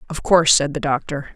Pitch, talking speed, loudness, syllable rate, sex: 150 Hz, 220 wpm, -17 LUFS, 6.1 syllables/s, female